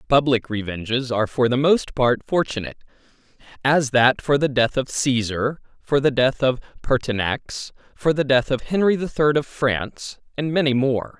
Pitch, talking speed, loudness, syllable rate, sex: 130 Hz, 170 wpm, -21 LUFS, 4.9 syllables/s, male